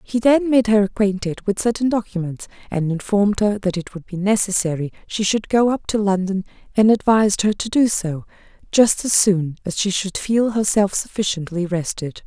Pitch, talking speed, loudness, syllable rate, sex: 200 Hz, 185 wpm, -19 LUFS, 5.1 syllables/s, female